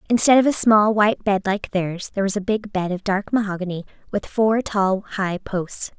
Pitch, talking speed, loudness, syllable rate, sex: 200 Hz, 210 wpm, -20 LUFS, 5.0 syllables/s, female